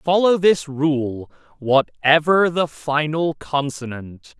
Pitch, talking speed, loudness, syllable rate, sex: 150 Hz, 95 wpm, -19 LUFS, 3.2 syllables/s, male